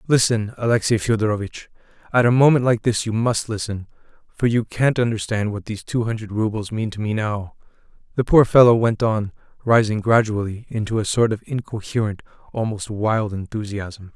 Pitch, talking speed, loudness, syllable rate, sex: 110 Hz, 165 wpm, -20 LUFS, 5.3 syllables/s, male